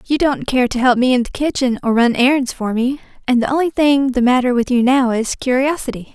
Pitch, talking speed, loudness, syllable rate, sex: 255 Hz, 245 wpm, -16 LUFS, 5.7 syllables/s, female